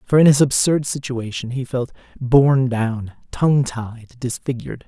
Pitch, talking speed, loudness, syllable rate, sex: 130 Hz, 150 wpm, -19 LUFS, 4.7 syllables/s, male